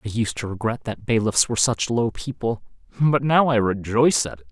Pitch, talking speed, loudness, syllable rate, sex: 115 Hz, 215 wpm, -21 LUFS, 5.7 syllables/s, male